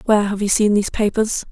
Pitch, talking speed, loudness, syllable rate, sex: 210 Hz, 240 wpm, -18 LUFS, 6.8 syllables/s, female